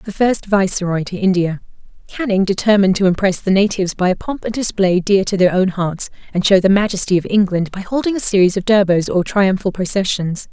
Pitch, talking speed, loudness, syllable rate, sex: 195 Hz, 205 wpm, -16 LUFS, 5.8 syllables/s, female